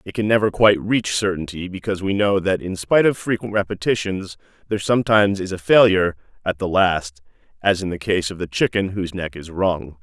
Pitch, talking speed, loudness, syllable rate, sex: 95 Hz, 205 wpm, -20 LUFS, 6.0 syllables/s, male